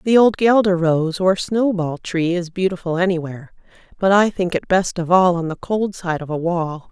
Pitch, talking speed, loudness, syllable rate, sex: 180 Hz, 210 wpm, -18 LUFS, 4.9 syllables/s, female